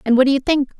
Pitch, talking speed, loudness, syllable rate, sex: 270 Hz, 380 wpm, -16 LUFS, 7.9 syllables/s, female